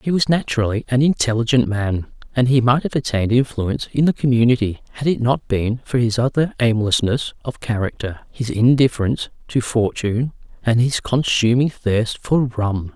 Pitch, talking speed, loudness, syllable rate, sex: 120 Hz, 160 wpm, -19 LUFS, 5.2 syllables/s, male